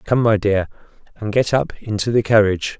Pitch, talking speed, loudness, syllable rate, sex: 110 Hz, 195 wpm, -18 LUFS, 5.4 syllables/s, male